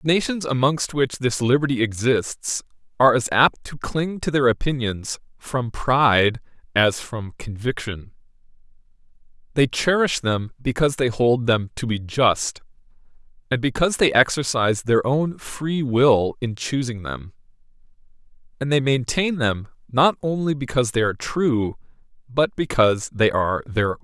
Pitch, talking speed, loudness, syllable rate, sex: 125 Hz, 140 wpm, -21 LUFS, 4.6 syllables/s, male